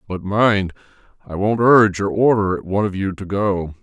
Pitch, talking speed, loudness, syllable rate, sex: 100 Hz, 190 wpm, -18 LUFS, 5.0 syllables/s, male